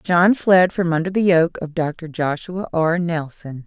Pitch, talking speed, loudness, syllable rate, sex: 170 Hz, 180 wpm, -19 LUFS, 3.9 syllables/s, female